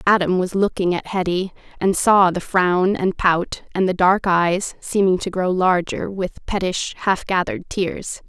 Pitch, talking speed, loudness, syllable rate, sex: 185 Hz, 175 wpm, -19 LUFS, 4.2 syllables/s, female